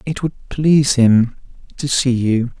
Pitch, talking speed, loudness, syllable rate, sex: 130 Hz, 160 wpm, -16 LUFS, 3.9 syllables/s, male